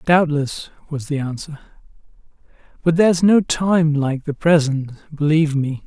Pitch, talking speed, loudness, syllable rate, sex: 155 Hz, 135 wpm, -18 LUFS, 4.6 syllables/s, male